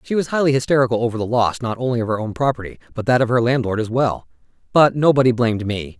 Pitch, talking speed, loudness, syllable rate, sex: 120 Hz, 240 wpm, -18 LUFS, 6.8 syllables/s, male